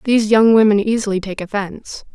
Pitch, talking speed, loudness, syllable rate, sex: 210 Hz, 170 wpm, -15 LUFS, 6.1 syllables/s, female